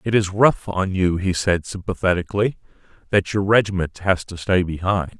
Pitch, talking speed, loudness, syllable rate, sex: 95 Hz, 175 wpm, -20 LUFS, 5.0 syllables/s, male